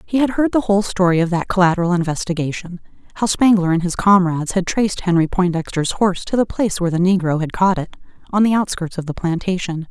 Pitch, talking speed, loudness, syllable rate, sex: 185 Hz, 200 wpm, -18 LUFS, 6.4 syllables/s, female